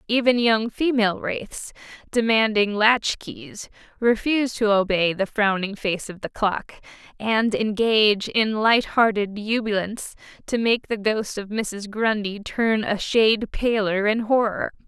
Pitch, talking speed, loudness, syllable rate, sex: 215 Hz, 135 wpm, -22 LUFS, 4.1 syllables/s, female